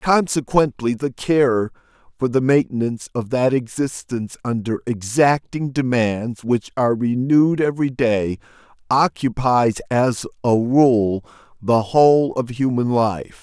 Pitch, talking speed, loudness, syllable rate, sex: 125 Hz, 115 wpm, -19 LUFS, 4.2 syllables/s, male